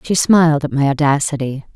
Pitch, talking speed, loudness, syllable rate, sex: 150 Hz, 170 wpm, -15 LUFS, 5.7 syllables/s, female